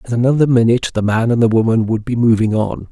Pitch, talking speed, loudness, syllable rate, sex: 115 Hz, 245 wpm, -15 LUFS, 6.7 syllables/s, male